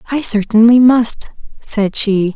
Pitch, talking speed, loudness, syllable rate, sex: 225 Hz, 125 wpm, -12 LUFS, 3.7 syllables/s, female